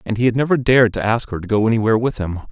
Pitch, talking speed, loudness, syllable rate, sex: 115 Hz, 310 wpm, -17 LUFS, 7.7 syllables/s, male